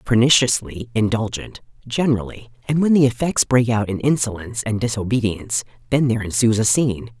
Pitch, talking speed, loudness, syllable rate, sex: 115 Hz, 150 wpm, -19 LUFS, 5.9 syllables/s, female